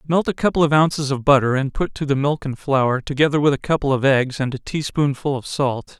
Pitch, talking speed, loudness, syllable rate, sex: 140 Hz, 260 wpm, -19 LUFS, 5.6 syllables/s, male